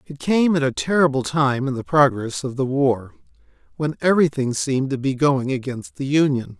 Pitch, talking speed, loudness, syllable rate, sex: 140 Hz, 190 wpm, -20 LUFS, 5.2 syllables/s, male